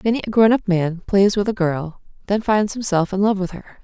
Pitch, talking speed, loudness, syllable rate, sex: 195 Hz, 250 wpm, -19 LUFS, 5.4 syllables/s, female